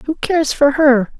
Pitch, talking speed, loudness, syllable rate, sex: 285 Hz, 200 wpm, -14 LUFS, 4.5 syllables/s, female